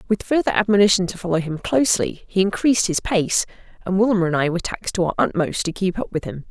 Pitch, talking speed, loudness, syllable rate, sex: 190 Hz, 230 wpm, -20 LUFS, 6.5 syllables/s, female